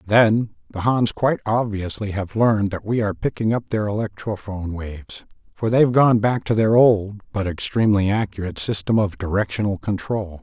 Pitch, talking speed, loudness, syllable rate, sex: 105 Hz, 165 wpm, -21 LUFS, 5.4 syllables/s, male